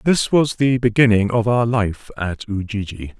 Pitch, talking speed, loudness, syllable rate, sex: 110 Hz, 170 wpm, -18 LUFS, 4.4 syllables/s, male